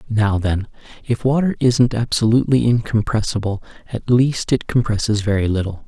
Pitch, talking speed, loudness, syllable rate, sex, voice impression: 115 Hz, 135 wpm, -18 LUFS, 5.1 syllables/s, male, very masculine, very adult-like, thick, slightly relaxed, powerful, slightly dark, soft, muffled, slightly fluent, cool, intellectual, slightly refreshing, very sincere, very calm, slightly mature, friendly, reassuring, unique, very elegant, slightly wild, sweet, slightly lively, kind, modest